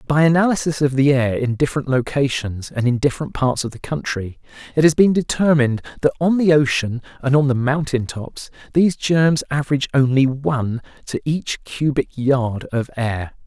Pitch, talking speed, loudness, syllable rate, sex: 140 Hz, 175 wpm, -19 LUFS, 5.2 syllables/s, male